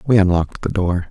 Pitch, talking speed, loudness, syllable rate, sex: 95 Hz, 220 wpm, -18 LUFS, 6.3 syllables/s, male